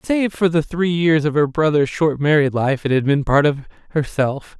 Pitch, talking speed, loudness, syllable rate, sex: 150 Hz, 220 wpm, -18 LUFS, 4.8 syllables/s, male